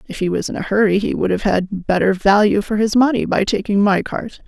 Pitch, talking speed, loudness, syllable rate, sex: 205 Hz, 255 wpm, -17 LUFS, 5.6 syllables/s, female